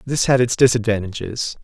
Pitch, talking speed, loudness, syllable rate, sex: 115 Hz, 145 wpm, -18 LUFS, 5.4 syllables/s, male